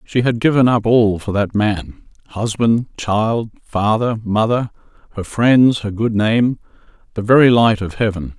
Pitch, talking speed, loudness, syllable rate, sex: 110 Hz, 150 wpm, -16 LUFS, 4.1 syllables/s, male